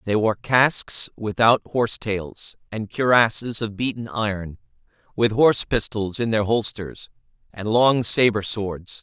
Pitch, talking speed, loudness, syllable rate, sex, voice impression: 110 Hz, 140 wpm, -21 LUFS, 4.2 syllables/s, male, masculine, adult-like, slightly powerful, clear, slightly refreshing, unique, slightly sharp